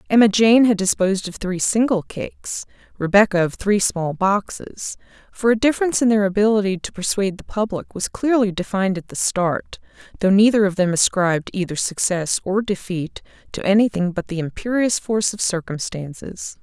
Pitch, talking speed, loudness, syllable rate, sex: 200 Hz, 165 wpm, -20 LUFS, 5.3 syllables/s, female